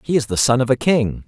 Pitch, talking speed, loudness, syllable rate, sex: 130 Hz, 330 wpm, -17 LUFS, 6.0 syllables/s, male